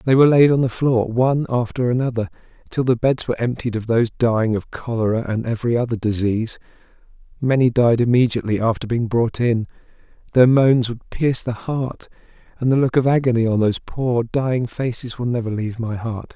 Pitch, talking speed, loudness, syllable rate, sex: 120 Hz, 180 wpm, -19 LUFS, 5.9 syllables/s, male